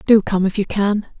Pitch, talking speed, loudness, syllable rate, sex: 205 Hz, 250 wpm, -18 LUFS, 5.1 syllables/s, female